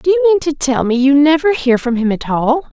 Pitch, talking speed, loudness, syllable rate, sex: 285 Hz, 280 wpm, -14 LUFS, 5.3 syllables/s, female